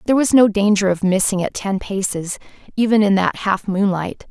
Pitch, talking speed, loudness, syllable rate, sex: 200 Hz, 195 wpm, -17 LUFS, 5.3 syllables/s, female